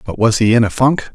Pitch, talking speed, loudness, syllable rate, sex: 110 Hz, 315 wpm, -14 LUFS, 5.9 syllables/s, male